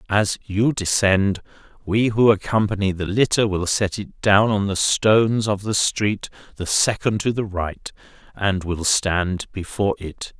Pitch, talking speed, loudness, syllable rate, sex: 100 Hz, 160 wpm, -20 LUFS, 4.1 syllables/s, male